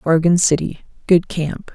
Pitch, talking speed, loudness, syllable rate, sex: 165 Hz, 105 wpm, -17 LUFS, 4.9 syllables/s, female